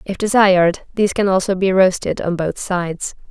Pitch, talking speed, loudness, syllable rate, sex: 190 Hz, 180 wpm, -17 LUFS, 5.3 syllables/s, female